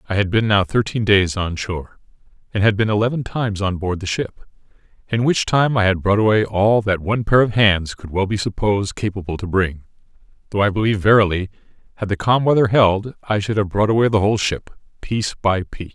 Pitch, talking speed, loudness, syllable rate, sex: 100 Hz, 215 wpm, -18 LUFS, 5.9 syllables/s, male